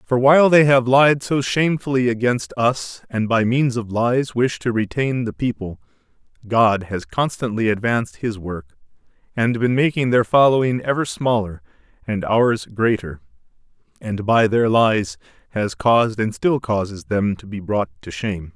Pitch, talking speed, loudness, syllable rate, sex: 115 Hz, 160 wpm, -19 LUFS, 4.6 syllables/s, male